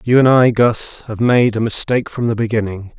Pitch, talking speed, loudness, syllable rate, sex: 115 Hz, 220 wpm, -15 LUFS, 5.4 syllables/s, male